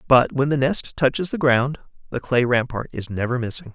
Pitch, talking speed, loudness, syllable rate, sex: 130 Hz, 210 wpm, -21 LUFS, 5.3 syllables/s, male